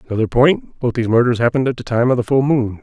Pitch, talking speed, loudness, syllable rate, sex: 120 Hz, 275 wpm, -16 LUFS, 7.2 syllables/s, male